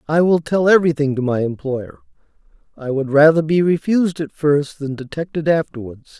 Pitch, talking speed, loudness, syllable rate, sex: 150 Hz, 165 wpm, -17 LUFS, 5.3 syllables/s, male